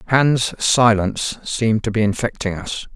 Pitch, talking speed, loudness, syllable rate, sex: 110 Hz, 140 wpm, -18 LUFS, 4.7 syllables/s, male